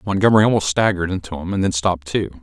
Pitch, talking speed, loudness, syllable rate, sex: 90 Hz, 225 wpm, -18 LUFS, 7.4 syllables/s, male